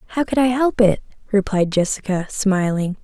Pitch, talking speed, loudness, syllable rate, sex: 205 Hz, 160 wpm, -19 LUFS, 5.1 syllables/s, female